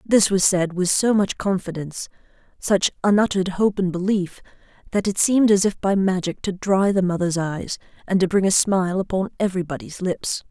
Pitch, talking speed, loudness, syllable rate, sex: 190 Hz, 185 wpm, -21 LUFS, 5.4 syllables/s, female